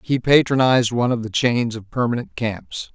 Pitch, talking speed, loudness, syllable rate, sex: 120 Hz, 185 wpm, -19 LUFS, 5.3 syllables/s, male